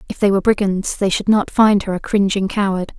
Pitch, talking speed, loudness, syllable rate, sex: 200 Hz, 240 wpm, -17 LUFS, 5.7 syllables/s, female